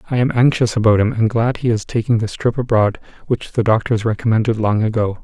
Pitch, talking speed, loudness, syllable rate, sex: 115 Hz, 220 wpm, -17 LUFS, 6.0 syllables/s, male